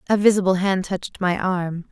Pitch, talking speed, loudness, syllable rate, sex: 185 Hz, 190 wpm, -21 LUFS, 5.3 syllables/s, female